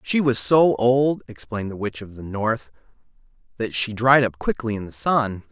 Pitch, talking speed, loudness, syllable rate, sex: 115 Hz, 195 wpm, -21 LUFS, 4.7 syllables/s, male